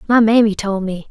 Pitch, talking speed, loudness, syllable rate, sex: 210 Hz, 215 wpm, -15 LUFS, 5.4 syllables/s, female